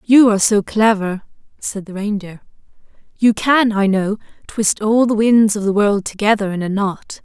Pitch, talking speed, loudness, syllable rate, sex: 210 Hz, 180 wpm, -16 LUFS, 4.7 syllables/s, female